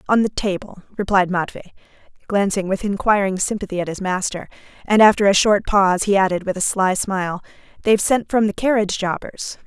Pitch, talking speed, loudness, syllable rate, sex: 195 Hz, 180 wpm, -19 LUFS, 5.9 syllables/s, female